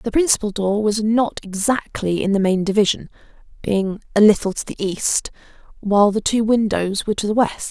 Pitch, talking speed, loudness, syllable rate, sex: 205 Hz, 180 wpm, -19 LUFS, 5.2 syllables/s, female